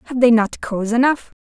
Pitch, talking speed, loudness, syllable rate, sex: 235 Hz, 210 wpm, -17 LUFS, 6.3 syllables/s, female